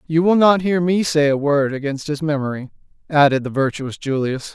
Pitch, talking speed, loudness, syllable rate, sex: 150 Hz, 200 wpm, -18 LUFS, 5.2 syllables/s, male